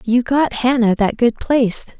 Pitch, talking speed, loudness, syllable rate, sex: 240 Hz, 180 wpm, -16 LUFS, 4.5 syllables/s, female